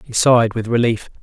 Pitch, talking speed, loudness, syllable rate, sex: 115 Hz, 195 wpm, -16 LUFS, 5.8 syllables/s, male